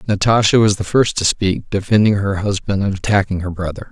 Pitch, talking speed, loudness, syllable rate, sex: 100 Hz, 200 wpm, -16 LUFS, 5.6 syllables/s, male